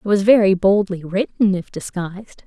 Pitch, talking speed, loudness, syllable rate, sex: 195 Hz, 170 wpm, -18 LUFS, 5.0 syllables/s, female